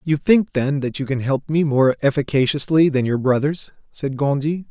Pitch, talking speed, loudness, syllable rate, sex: 140 Hz, 190 wpm, -19 LUFS, 4.8 syllables/s, male